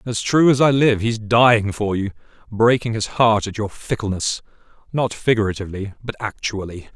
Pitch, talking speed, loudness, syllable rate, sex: 110 Hz, 165 wpm, -19 LUFS, 5.2 syllables/s, male